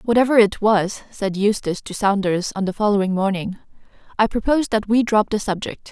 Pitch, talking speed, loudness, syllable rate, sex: 205 Hz, 185 wpm, -19 LUFS, 5.6 syllables/s, female